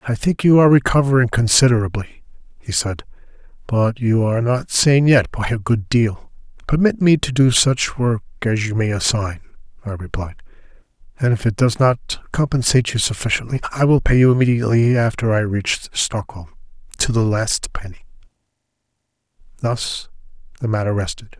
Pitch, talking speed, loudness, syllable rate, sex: 120 Hz, 150 wpm, -18 LUFS, 5.2 syllables/s, male